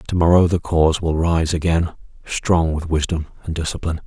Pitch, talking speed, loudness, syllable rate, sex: 80 Hz, 175 wpm, -19 LUFS, 5.5 syllables/s, male